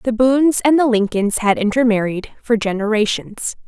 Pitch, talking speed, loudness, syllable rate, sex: 230 Hz, 145 wpm, -17 LUFS, 4.9 syllables/s, female